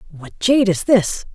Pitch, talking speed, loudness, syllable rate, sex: 200 Hz, 180 wpm, -17 LUFS, 4.2 syllables/s, female